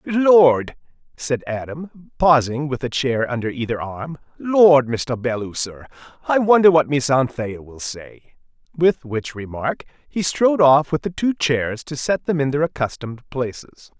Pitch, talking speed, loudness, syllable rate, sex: 140 Hz, 160 wpm, -19 LUFS, 4.2 syllables/s, male